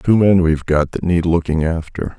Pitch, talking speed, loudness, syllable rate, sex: 85 Hz, 220 wpm, -16 LUFS, 5.1 syllables/s, male